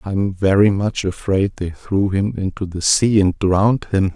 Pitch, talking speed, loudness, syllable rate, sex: 100 Hz, 200 wpm, -18 LUFS, 4.5 syllables/s, male